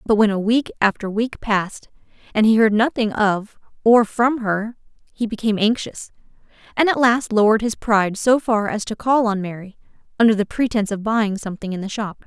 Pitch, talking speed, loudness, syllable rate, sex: 215 Hz, 195 wpm, -19 LUFS, 5.5 syllables/s, female